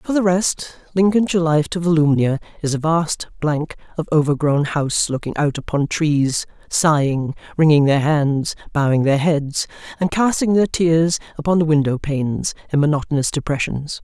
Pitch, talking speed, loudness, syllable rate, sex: 155 Hz, 155 wpm, -18 LUFS, 4.8 syllables/s, female